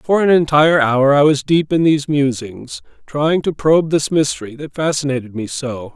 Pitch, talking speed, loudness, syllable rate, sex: 145 Hz, 190 wpm, -15 LUFS, 5.1 syllables/s, male